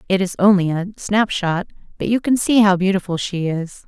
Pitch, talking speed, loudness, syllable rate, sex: 190 Hz, 215 wpm, -18 LUFS, 5.3 syllables/s, female